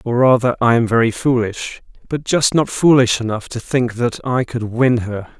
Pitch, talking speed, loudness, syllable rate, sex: 120 Hz, 200 wpm, -16 LUFS, 4.7 syllables/s, male